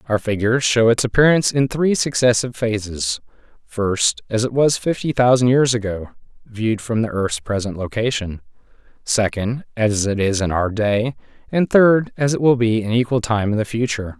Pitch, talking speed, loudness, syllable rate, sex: 115 Hz, 180 wpm, -18 LUFS, 4.6 syllables/s, male